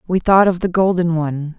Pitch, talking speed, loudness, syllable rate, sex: 175 Hz, 225 wpm, -16 LUFS, 5.6 syllables/s, female